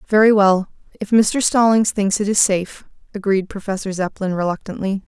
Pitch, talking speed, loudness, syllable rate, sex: 200 Hz, 150 wpm, -18 LUFS, 5.3 syllables/s, female